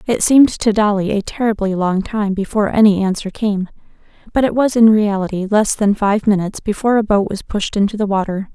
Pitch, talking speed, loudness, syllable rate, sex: 205 Hz, 205 wpm, -16 LUFS, 5.8 syllables/s, female